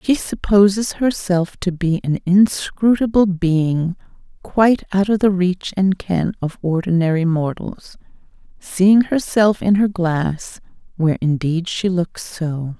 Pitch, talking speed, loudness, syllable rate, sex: 185 Hz, 125 wpm, -17 LUFS, 3.8 syllables/s, female